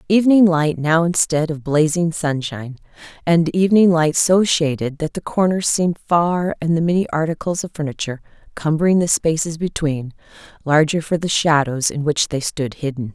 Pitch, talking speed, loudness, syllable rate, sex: 160 Hz, 165 wpm, -18 LUFS, 5.2 syllables/s, female